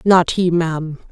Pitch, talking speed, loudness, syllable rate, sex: 170 Hz, 160 wpm, -17 LUFS, 4.4 syllables/s, female